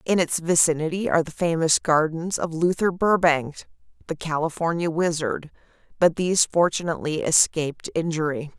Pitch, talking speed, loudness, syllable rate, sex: 165 Hz, 125 wpm, -22 LUFS, 5.2 syllables/s, female